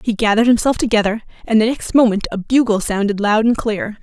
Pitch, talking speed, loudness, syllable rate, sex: 220 Hz, 210 wpm, -16 LUFS, 6.1 syllables/s, female